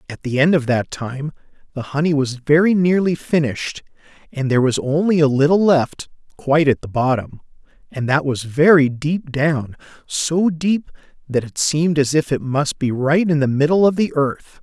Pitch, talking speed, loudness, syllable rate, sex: 145 Hz, 190 wpm, -18 LUFS, 4.9 syllables/s, male